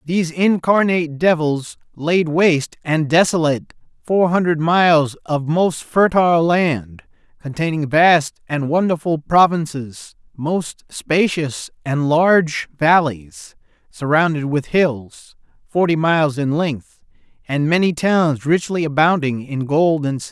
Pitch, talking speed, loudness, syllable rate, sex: 160 Hz, 120 wpm, -17 LUFS, 4.0 syllables/s, male